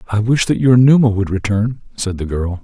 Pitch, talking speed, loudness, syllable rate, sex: 110 Hz, 230 wpm, -15 LUFS, 5.3 syllables/s, male